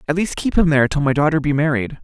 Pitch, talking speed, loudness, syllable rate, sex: 145 Hz, 295 wpm, -17 LUFS, 7.1 syllables/s, male